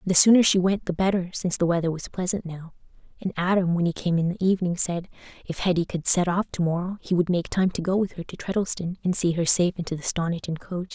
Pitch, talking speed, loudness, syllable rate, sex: 180 Hz, 250 wpm, -24 LUFS, 6.3 syllables/s, female